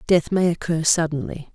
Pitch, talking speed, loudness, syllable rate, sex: 160 Hz, 155 wpm, -21 LUFS, 5.0 syllables/s, female